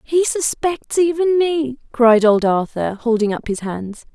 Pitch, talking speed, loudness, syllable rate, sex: 265 Hz, 160 wpm, -17 LUFS, 4.0 syllables/s, female